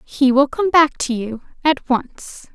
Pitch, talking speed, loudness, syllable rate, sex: 275 Hz, 190 wpm, -17 LUFS, 3.8 syllables/s, female